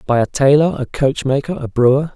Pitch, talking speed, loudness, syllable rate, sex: 140 Hz, 195 wpm, -16 LUFS, 5.6 syllables/s, male